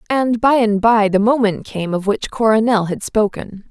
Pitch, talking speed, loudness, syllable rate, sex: 215 Hz, 195 wpm, -16 LUFS, 4.6 syllables/s, female